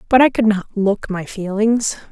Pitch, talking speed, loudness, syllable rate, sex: 210 Hz, 200 wpm, -17 LUFS, 4.7 syllables/s, female